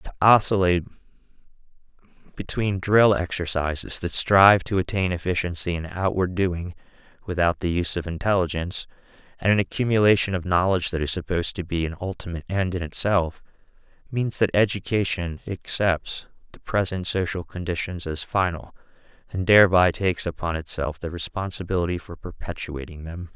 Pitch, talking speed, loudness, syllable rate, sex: 90 Hz, 135 wpm, -23 LUFS, 5.6 syllables/s, male